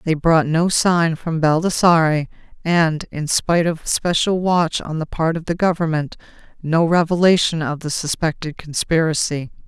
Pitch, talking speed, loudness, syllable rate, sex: 160 Hz, 150 wpm, -18 LUFS, 4.5 syllables/s, female